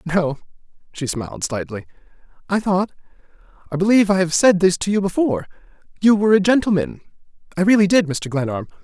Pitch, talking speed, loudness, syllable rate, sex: 180 Hz, 135 wpm, -18 LUFS, 6.4 syllables/s, male